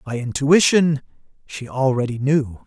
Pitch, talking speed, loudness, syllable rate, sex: 140 Hz, 115 wpm, -19 LUFS, 4.3 syllables/s, male